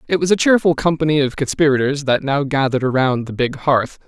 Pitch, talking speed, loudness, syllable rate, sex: 140 Hz, 205 wpm, -17 LUFS, 6.0 syllables/s, male